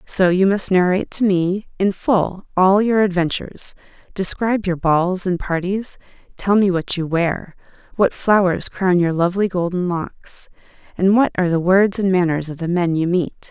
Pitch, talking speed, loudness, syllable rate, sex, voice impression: 185 Hz, 180 wpm, -18 LUFS, 4.7 syllables/s, female, feminine, slightly gender-neutral, slightly young, slightly adult-like, thin, slightly tensed, slightly powerful, hard, clear, fluent, slightly cute, cool, very intellectual, refreshing, very sincere, very calm, very friendly, reassuring, very unique, elegant, very sweet, slightly lively, very kind